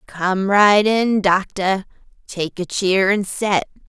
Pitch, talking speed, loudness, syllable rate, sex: 195 Hz, 135 wpm, -18 LUFS, 3.2 syllables/s, female